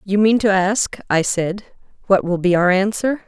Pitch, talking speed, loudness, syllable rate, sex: 200 Hz, 200 wpm, -17 LUFS, 4.6 syllables/s, female